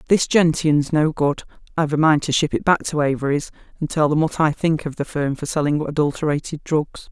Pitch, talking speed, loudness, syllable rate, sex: 150 Hz, 220 wpm, -20 LUFS, 5.6 syllables/s, female